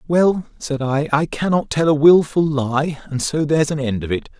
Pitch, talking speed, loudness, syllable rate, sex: 150 Hz, 220 wpm, -18 LUFS, 4.8 syllables/s, male